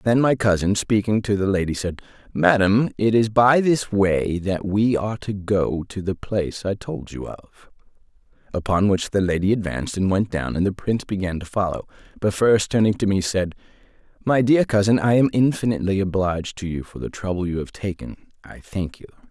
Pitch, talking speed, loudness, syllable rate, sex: 100 Hz, 200 wpm, -21 LUFS, 5.3 syllables/s, male